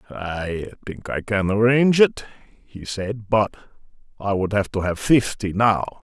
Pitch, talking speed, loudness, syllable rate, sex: 105 Hz, 155 wpm, -21 LUFS, 4.2 syllables/s, male